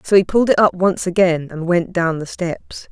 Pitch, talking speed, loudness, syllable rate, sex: 180 Hz, 245 wpm, -17 LUFS, 5.1 syllables/s, female